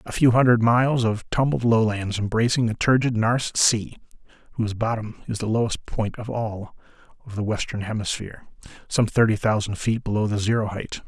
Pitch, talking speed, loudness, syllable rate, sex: 110 Hz, 165 wpm, -22 LUFS, 5.5 syllables/s, male